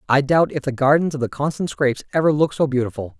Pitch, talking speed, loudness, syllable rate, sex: 140 Hz, 245 wpm, -19 LUFS, 7.0 syllables/s, male